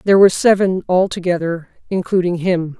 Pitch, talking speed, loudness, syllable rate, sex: 180 Hz, 150 wpm, -16 LUFS, 5.7 syllables/s, female